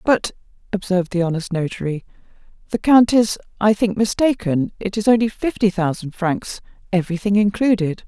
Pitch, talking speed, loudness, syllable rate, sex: 200 Hz, 140 wpm, -19 LUFS, 5.3 syllables/s, female